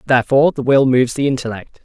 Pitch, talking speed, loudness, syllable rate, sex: 130 Hz, 195 wpm, -15 LUFS, 7.3 syllables/s, male